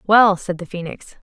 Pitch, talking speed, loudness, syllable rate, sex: 190 Hz, 185 wpm, -18 LUFS, 4.5 syllables/s, female